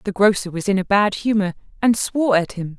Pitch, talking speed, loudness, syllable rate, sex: 200 Hz, 235 wpm, -19 LUFS, 5.8 syllables/s, female